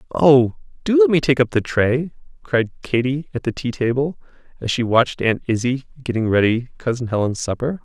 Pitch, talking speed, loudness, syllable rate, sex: 130 Hz, 185 wpm, -19 LUFS, 5.4 syllables/s, male